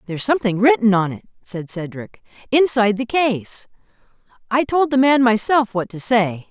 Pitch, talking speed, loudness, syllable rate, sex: 225 Hz, 155 wpm, -18 LUFS, 5.2 syllables/s, female